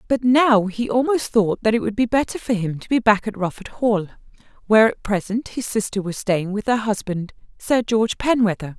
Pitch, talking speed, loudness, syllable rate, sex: 220 Hz, 210 wpm, -20 LUFS, 5.3 syllables/s, female